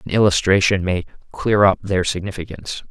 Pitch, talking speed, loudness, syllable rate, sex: 95 Hz, 145 wpm, -18 LUFS, 5.7 syllables/s, male